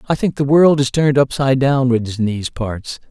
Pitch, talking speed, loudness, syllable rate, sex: 130 Hz, 215 wpm, -16 LUFS, 5.6 syllables/s, male